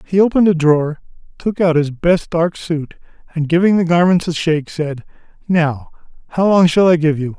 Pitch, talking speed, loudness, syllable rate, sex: 165 Hz, 195 wpm, -15 LUFS, 5.3 syllables/s, male